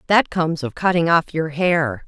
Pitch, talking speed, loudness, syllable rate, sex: 170 Hz, 205 wpm, -19 LUFS, 4.8 syllables/s, female